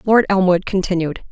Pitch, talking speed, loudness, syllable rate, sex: 185 Hz, 135 wpm, -17 LUFS, 5.2 syllables/s, female